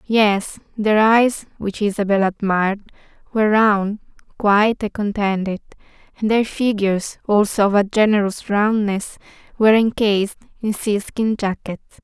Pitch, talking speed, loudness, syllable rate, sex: 210 Hz, 120 wpm, -18 LUFS, 4.5 syllables/s, female